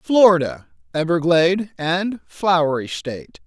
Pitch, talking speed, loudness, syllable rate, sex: 175 Hz, 85 wpm, -19 LUFS, 4.3 syllables/s, male